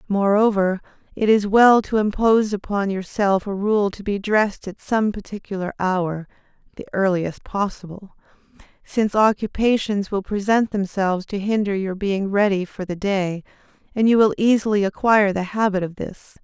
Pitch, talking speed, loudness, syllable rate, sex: 200 Hz, 155 wpm, -20 LUFS, 4.8 syllables/s, female